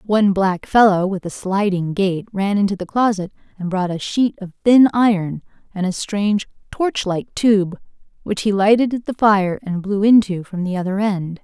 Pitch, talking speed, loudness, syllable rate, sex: 195 Hz, 195 wpm, -18 LUFS, 4.7 syllables/s, female